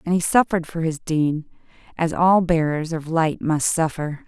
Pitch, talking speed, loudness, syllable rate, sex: 165 Hz, 185 wpm, -21 LUFS, 4.7 syllables/s, female